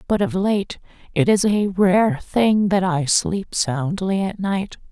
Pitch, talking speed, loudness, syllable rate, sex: 190 Hz, 170 wpm, -19 LUFS, 3.5 syllables/s, female